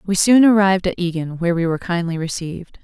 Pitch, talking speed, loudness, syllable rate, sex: 180 Hz, 210 wpm, -17 LUFS, 6.8 syllables/s, female